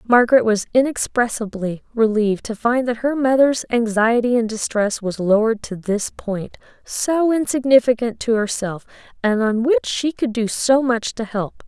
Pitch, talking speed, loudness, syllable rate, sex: 230 Hz, 160 wpm, -19 LUFS, 4.7 syllables/s, female